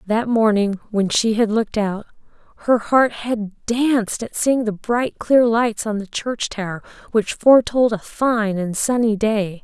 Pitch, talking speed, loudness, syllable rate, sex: 220 Hz, 175 wpm, -19 LUFS, 4.1 syllables/s, female